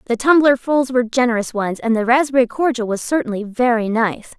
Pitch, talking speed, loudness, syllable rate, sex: 245 Hz, 180 wpm, -17 LUFS, 5.8 syllables/s, female